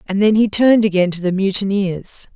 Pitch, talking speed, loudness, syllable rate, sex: 200 Hz, 205 wpm, -16 LUFS, 5.4 syllables/s, female